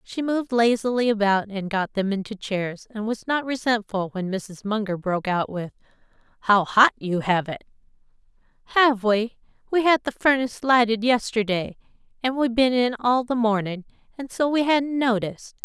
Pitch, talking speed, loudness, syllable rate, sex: 225 Hz, 170 wpm, -23 LUFS, 5.0 syllables/s, female